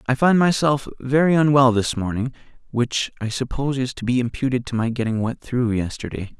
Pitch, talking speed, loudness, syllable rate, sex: 125 Hz, 190 wpm, -21 LUFS, 5.5 syllables/s, male